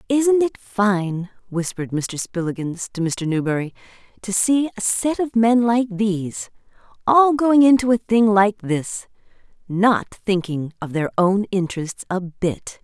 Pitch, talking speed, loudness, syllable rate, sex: 205 Hz, 150 wpm, -20 LUFS, 4.1 syllables/s, female